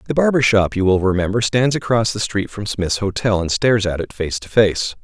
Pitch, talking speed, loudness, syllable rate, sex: 105 Hz, 240 wpm, -18 LUFS, 5.4 syllables/s, male